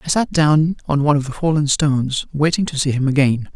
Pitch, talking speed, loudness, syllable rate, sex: 145 Hz, 235 wpm, -17 LUFS, 5.9 syllables/s, male